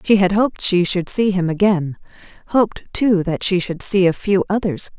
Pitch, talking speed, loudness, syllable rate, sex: 190 Hz, 190 wpm, -17 LUFS, 5.0 syllables/s, female